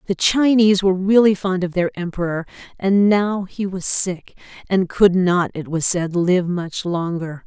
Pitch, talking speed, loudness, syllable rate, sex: 185 Hz, 175 wpm, -18 LUFS, 4.4 syllables/s, female